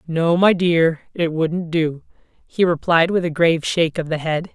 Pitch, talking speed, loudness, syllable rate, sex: 165 Hz, 200 wpm, -18 LUFS, 4.7 syllables/s, female